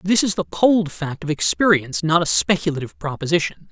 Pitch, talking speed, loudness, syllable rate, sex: 165 Hz, 180 wpm, -19 LUFS, 5.8 syllables/s, male